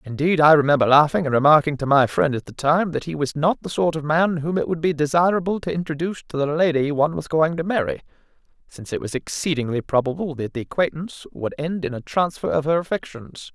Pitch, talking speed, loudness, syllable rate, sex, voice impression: 150 Hz, 225 wpm, -21 LUFS, 6.2 syllables/s, male, masculine, adult-like, cool, sincere, slightly calm, slightly friendly